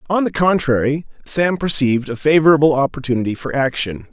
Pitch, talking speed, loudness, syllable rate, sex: 145 Hz, 145 wpm, -17 LUFS, 6.0 syllables/s, male